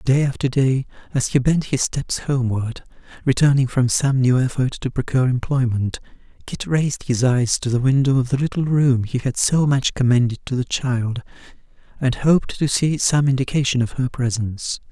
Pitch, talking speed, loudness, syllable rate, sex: 130 Hz, 180 wpm, -20 LUFS, 5.1 syllables/s, male